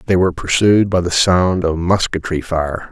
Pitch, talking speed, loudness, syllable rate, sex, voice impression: 90 Hz, 185 wpm, -15 LUFS, 4.8 syllables/s, male, very masculine, old, very thick, very tensed, very powerful, dark, very soft, very muffled, fluent, raspy, very cool, very intellectual, sincere, very calm, very mature, very friendly, very reassuring, very unique, very elegant, very wild, very sweet, lively, slightly strict, slightly modest